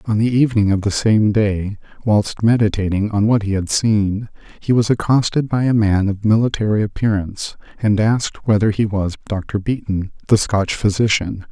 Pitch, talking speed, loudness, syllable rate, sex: 105 Hz, 170 wpm, -17 LUFS, 5.0 syllables/s, male